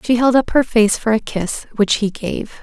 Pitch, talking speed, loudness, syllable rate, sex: 225 Hz, 250 wpm, -17 LUFS, 4.5 syllables/s, female